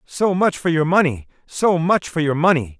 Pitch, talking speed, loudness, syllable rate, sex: 165 Hz, 215 wpm, -18 LUFS, 4.8 syllables/s, male